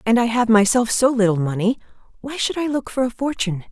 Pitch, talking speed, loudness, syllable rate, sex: 230 Hz, 225 wpm, -19 LUFS, 6.2 syllables/s, female